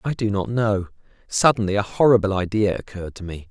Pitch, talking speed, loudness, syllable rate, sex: 100 Hz, 190 wpm, -21 LUFS, 6.0 syllables/s, male